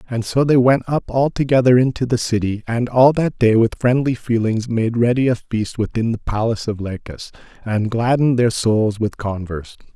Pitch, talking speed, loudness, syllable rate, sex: 115 Hz, 195 wpm, -18 LUFS, 5.2 syllables/s, male